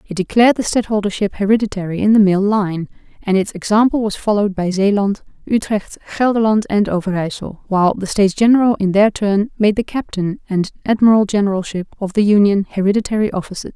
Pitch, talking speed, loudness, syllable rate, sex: 205 Hz, 165 wpm, -16 LUFS, 6.1 syllables/s, female